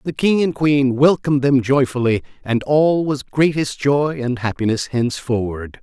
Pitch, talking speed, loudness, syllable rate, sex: 135 Hz, 155 wpm, -18 LUFS, 4.6 syllables/s, male